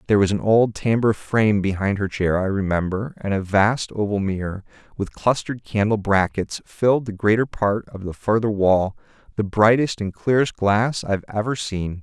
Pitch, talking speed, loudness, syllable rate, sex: 105 Hz, 180 wpm, -21 LUFS, 5.1 syllables/s, male